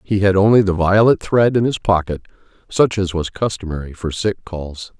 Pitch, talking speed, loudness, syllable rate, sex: 95 Hz, 190 wpm, -17 LUFS, 5.0 syllables/s, male